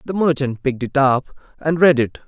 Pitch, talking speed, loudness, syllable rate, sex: 140 Hz, 210 wpm, -18 LUFS, 5.8 syllables/s, male